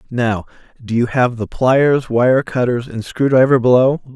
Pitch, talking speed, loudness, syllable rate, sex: 125 Hz, 175 wpm, -15 LUFS, 4.3 syllables/s, male